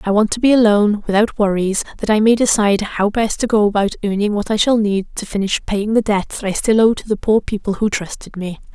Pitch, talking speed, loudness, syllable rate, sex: 210 Hz, 255 wpm, -16 LUFS, 5.9 syllables/s, female